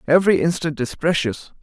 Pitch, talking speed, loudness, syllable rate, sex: 155 Hz, 150 wpm, -20 LUFS, 5.7 syllables/s, male